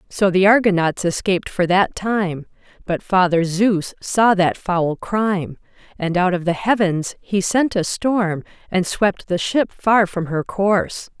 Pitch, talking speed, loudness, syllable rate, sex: 190 Hz, 165 wpm, -19 LUFS, 4.0 syllables/s, female